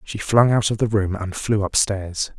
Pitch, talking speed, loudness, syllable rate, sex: 105 Hz, 225 wpm, -20 LUFS, 4.4 syllables/s, male